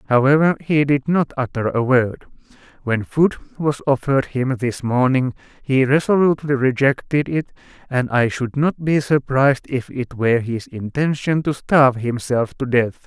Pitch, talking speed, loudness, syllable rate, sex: 135 Hz, 155 wpm, -19 LUFS, 4.6 syllables/s, male